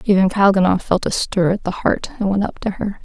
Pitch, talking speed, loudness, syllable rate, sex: 190 Hz, 255 wpm, -18 LUFS, 5.6 syllables/s, female